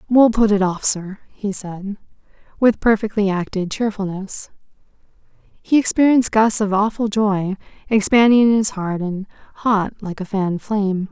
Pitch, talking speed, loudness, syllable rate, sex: 205 Hz, 145 wpm, -18 LUFS, 4.5 syllables/s, female